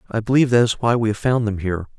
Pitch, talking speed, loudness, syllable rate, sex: 115 Hz, 300 wpm, -19 LUFS, 7.6 syllables/s, male